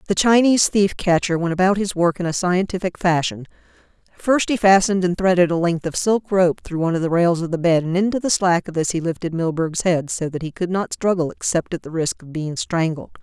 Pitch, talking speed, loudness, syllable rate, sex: 175 Hz, 240 wpm, -19 LUFS, 5.7 syllables/s, female